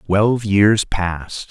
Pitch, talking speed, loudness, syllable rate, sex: 100 Hz, 120 wpm, -17 LUFS, 3.6 syllables/s, male